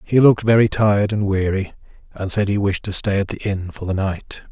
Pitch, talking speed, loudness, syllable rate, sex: 100 Hz, 240 wpm, -19 LUFS, 5.5 syllables/s, male